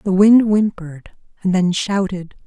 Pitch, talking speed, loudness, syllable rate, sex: 190 Hz, 145 wpm, -16 LUFS, 4.5 syllables/s, female